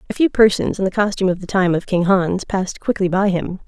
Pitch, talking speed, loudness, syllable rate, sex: 190 Hz, 260 wpm, -18 LUFS, 6.1 syllables/s, female